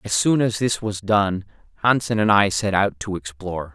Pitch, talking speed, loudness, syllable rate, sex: 100 Hz, 210 wpm, -21 LUFS, 4.9 syllables/s, male